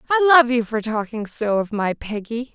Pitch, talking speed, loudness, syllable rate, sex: 235 Hz, 210 wpm, -20 LUFS, 4.8 syllables/s, female